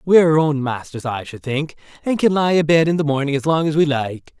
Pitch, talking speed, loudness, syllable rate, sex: 150 Hz, 285 wpm, -18 LUFS, 6.0 syllables/s, male